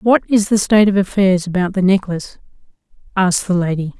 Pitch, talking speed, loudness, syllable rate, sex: 190 Hz, 180 wpm, -16 LUFS, 6.1 syllables/s, female